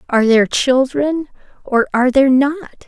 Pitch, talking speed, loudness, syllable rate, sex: 265 Hz, 145 wpm, -15 LUFS, 5.3 syllables/s, female